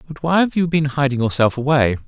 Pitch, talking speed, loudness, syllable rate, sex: 140 Hz, 230 wpm, -18 LUFS, 6.0 syllables/s, male